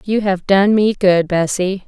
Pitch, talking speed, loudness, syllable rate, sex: 195 Hz, 190 wpm, -15 LUFS, 4.0 syllables/s, female